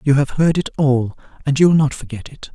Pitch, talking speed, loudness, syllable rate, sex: 140 Hz, 235 wpm, -17 LUFS, 5.4 syllables/s, male